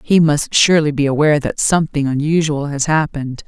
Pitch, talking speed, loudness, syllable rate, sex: 150 Hz, 175 wpm, -15 LUFS, 5.9 syllables/s, female